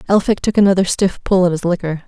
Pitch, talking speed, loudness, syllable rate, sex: 185 Hz, 230 wpm, -15 LUFS, 6.4 syllables/s, female